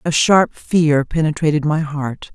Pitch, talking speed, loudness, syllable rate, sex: 155 Hz, 155 wpm, -17 LUFS, 4.0 syllables/s, female